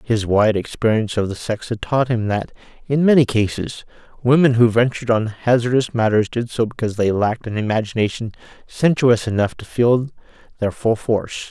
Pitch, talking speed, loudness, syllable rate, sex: 115 Hz, 170 wpm, -19 LUFS, 5.5 syllables/s, male